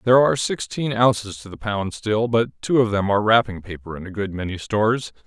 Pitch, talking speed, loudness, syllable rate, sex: 105 Hz, 230 wpm, -21 LUFS, 5.9 syllables/s, male